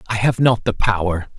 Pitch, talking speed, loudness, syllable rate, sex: 105 Hz, 215 wpm, -18 LUFS, 5.3 syllables/s, male